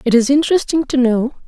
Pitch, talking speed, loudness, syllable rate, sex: 265 Hz, 205 wpm, -15 LUFS, 6.3 syllables/s, female